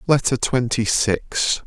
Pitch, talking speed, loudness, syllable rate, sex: 120 Hz, 110 wpm, -20 LUFS, 3.3 syllables/s, male